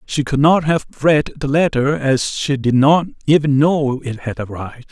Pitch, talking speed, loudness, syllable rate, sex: 140 Hz, 195 wpm, -16 LUFS, 4.6 syllables/s, male